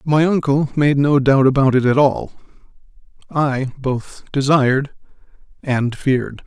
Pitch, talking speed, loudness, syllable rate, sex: 135 Hz, 130 wpm, -17 LUFS, 4.2 syllables/s, male